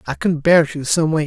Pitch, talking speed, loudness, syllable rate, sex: 150 Hz, 235 wpm, -16 LUFS, 5.8 syllables/s, male